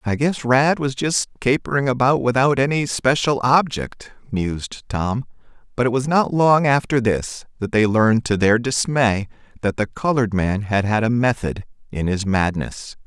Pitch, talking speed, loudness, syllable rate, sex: 120 Hz, 170 wpm, -19 LUFS, 4.6 syllables/s, male